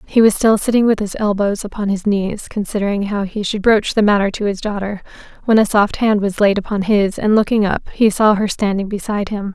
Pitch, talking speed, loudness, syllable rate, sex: 205 Hz, 235 wpm, -16 LUFS, 5.6 syllables/s, female